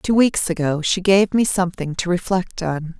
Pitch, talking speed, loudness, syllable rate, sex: 180 Hz, 200 wpm, -19 LUFS, 4.8 syllables/s, female